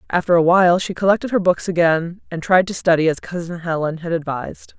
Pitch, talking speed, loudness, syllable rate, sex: 170 Hz, 215 wpm, -18 LUFS, 6.0 syllables/s, female